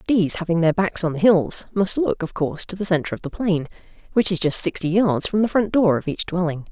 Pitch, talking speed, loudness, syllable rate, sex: 180 Hz, 260 wpm, -20 LUFS, 5.8 syllables/s, female